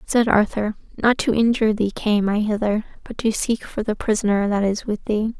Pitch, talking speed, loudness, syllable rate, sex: 215 Hz, 210 wpm, -21 LUFS, 5.2 syllables/s, female